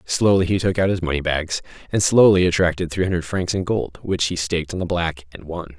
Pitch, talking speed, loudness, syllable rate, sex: 90 Hz, 240 wpm, -20 LUFS, 5.7 syllables/s, male